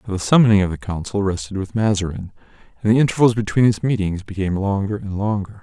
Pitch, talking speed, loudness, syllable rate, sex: 100 Hz, 205 wpm, -19 LUFS, 6.6 syllables/s, male